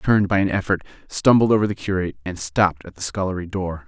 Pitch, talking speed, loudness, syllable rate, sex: 95 Hz, 230 wpm, -21 LUFS, 6.9 syllables/s, male